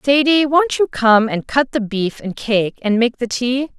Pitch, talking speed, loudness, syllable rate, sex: 245 Hz, 220 wpm, -17 LUFS, 4.2 syllables/s, female